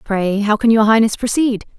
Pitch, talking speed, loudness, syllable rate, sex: 220 Hz, 200 wpm, -15 LUFS, 5.1 syllables/s, female